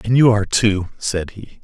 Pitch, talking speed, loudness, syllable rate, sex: 105 Hz, 220 wpm, -17 LUFS, 4.7 syllables/s, male